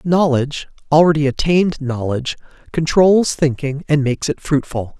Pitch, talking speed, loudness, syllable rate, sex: 145 Hz, 120 wpm, -17 LUFS, 5.2 syllables/s, male